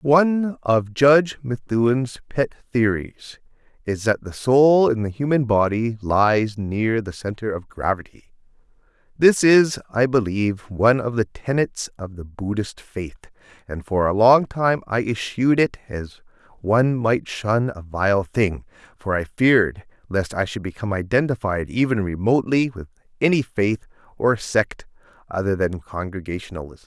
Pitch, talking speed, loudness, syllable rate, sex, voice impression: 110 Hz, 145 wpm, -21 LUFS, 4.5 syllables/s, male, very masculine, very adult-like, slightly thick, cool, slightly refreshing, slightly reassuring, slightly wild